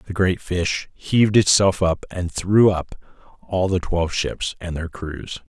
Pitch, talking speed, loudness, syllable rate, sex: 90 Hz, 175 wpm, -20 LUFS, 4.0 syllables/s, male